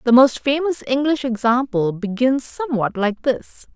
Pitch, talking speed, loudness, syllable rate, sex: 250 Hz, 145 wpm, -19 LUFS, 4.5 syllables/s, female